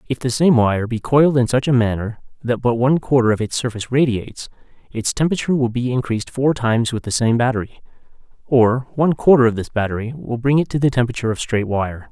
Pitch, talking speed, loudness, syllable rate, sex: 120 Hz, 220 wpm, -18 LUFS, 6.5 syllables/s, male